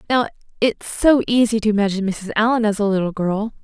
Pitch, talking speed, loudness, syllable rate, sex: 215 Hz, 200 wpm, -19 LUFS, 6.1 syllables/s, female